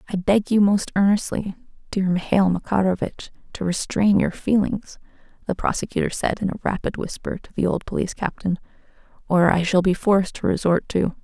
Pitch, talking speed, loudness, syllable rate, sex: 190 Hz, 170 wpm, -22 LUFS, 5.6 syllables/s, female